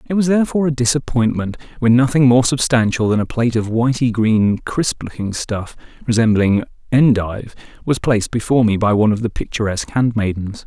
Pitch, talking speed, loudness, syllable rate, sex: 115 Hz, 170 wpm, -17 LUFS, 5.8 syllables/s, male